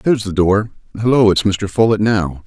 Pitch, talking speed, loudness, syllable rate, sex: 105 Hz, 195 wpm, -15 LUFS, 5.4 syllables/s, male